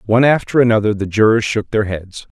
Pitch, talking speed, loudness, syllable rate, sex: 110 Hz, 200 wpm, -15 LUFS, 6.0 syllables/s, male